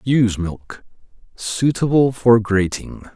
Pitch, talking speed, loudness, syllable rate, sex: 115 Hz, 95 wpm, -18 LUFS, 3.6 syllables/s, male